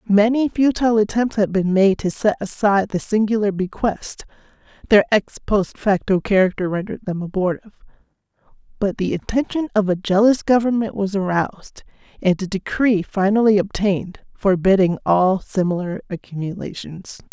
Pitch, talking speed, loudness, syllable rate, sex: 200 Hz, 130 wpm, -19 LUFS, 5.3 syllables/s, female